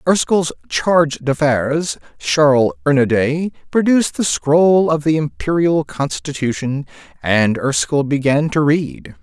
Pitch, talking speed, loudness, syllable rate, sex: 145 Hz, 110 wpm, -16 LUFS, 4.0 syllables/s, male